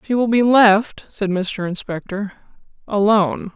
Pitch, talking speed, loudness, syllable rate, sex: 210 Hz, 135 wpm, -18 LUFS, 4.1 syllables/s, female